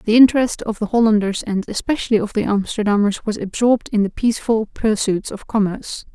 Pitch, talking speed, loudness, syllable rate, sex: 215 Hz, 175 wpm, -18 LUFS, 6.0 syllables/s, female